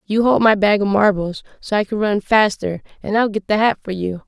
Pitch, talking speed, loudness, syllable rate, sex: 205 Hz, 250 wpm, -17 LUFS, 5.3 syllables/s, female